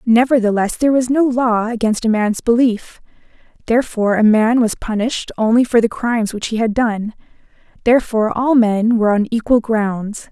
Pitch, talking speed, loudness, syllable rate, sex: 230 Hz, 170 wpm, -16 LUFS, 5.4 syllables/s, female